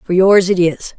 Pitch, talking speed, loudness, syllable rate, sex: 185 Hz, 245 wpm, -13 LUFS, 4.6 syllables/s, female